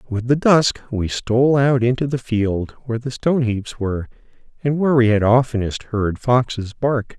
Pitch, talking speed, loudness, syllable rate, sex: 120 Hz, 185 wpm, -19 LUFS, 5.0 syllables/s, male